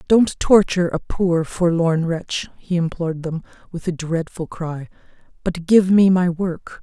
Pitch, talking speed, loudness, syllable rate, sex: 170 Hz, 160 wpm, -19 LUFS, 4.2 syllables/s, female